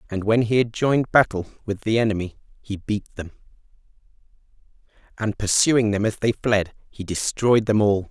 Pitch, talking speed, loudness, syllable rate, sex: 110 Hz, 165 wpm, -21 LUFS, 5.2 syllables/s, male